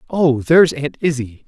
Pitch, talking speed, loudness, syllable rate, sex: 145 Hz, 165 wpm, -16 LUFS, 4.8 syllables/s, male